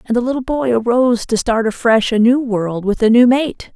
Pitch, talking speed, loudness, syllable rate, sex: 235 Hz, 240 wpm, -15 LUFS, 5.2 syllables/s, female